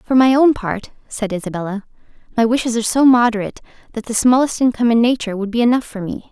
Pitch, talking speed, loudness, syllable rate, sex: 230 Hz, 210 wpm, -16 LUFS, 6.9 syllables/s, female